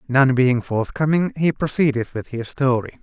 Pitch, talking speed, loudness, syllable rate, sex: 130 Hz, 160 wpm, -20 LUFS, 4.6 syllables/s, male